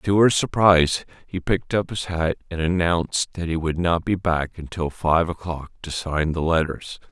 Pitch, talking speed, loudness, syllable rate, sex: 85 Hz, 195 wpm, -22 LUFS, 4.8 syllables/s, male